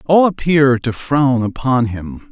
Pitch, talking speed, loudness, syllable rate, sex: 130 Hz, 155 wpm, -15 LUFS, 3.7 syllables/s, male